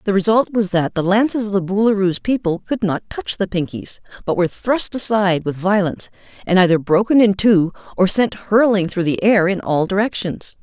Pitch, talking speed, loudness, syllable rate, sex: 195 Hz, 200 wpm, -17 LUFS, 5.4 syllables/s, female